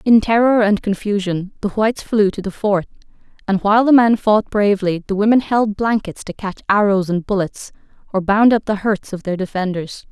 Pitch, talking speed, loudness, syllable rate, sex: 205 Hz, 195 wpm, -17 LUFS, 5.3 syllables/s, female